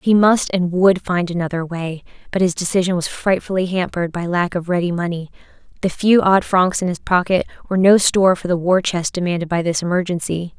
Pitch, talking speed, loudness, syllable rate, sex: 180 Hz, 205 wpm, -18 LUFS, 5.7 syllables/s, female